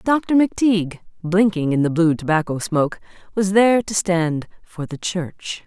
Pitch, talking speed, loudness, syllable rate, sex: 185 Hz, 160 wpm, -19 LUFS, 4.8 syllables/s, female